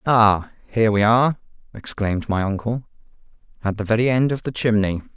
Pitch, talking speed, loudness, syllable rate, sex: 110 Hz, 165 wpm, -20 LUFS, 5.7 syllables/s, male